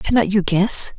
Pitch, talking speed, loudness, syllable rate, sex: 200 Hz, 185 wpm, -17 LUFS, 4.4 syllables/s, female